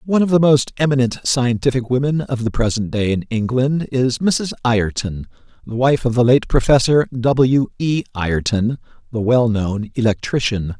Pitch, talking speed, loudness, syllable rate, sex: 125 Hz, 155 wpm, -17 LUFS, 4.6 syllables/s, male